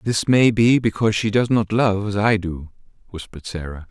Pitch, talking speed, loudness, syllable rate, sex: 105 Hz, 200 wpm, -19 LUFS, 5.3 syllables/s, male